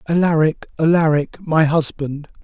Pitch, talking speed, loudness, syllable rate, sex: 155 Hz, 100 wpm, -18 LUFS, 4.6 syllables/s, male